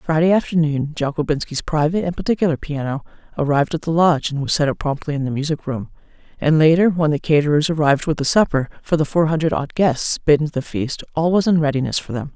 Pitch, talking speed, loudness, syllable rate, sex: 155 Hz, 220 wpm, -19 LUFS, 6.4 syllables/s, female